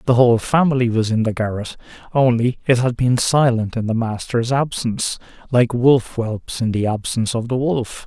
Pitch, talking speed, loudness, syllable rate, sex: 120 Hz, 185 wpm, -18 LUFS, 5.0 syllables/s, male